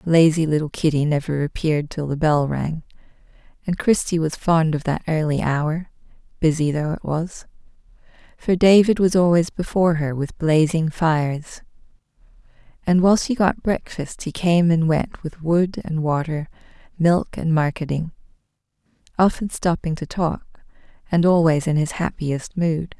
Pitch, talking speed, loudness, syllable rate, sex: 160 Hz, 145 wpm, -20 LUFS, 4.7 syllables/s, female